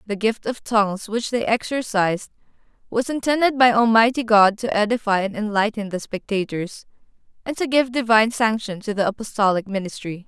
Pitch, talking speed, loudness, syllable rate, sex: 220 Hz, 160 wpm, -20 LUFS, 5.5 syllables/s, female